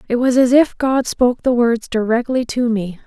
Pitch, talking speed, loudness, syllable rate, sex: 240 Hz, 215 wpm, -16 LUFS, 4.9 syllables/s, female